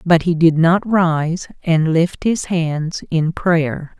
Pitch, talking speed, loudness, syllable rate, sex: 165 Hz, 165 wpm, -17 LUFS, 3.0 syllables/s, female